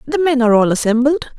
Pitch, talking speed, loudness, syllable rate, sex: 260 Hz, 215 wpm, -14 LUFS, 7.6 syllables/s, female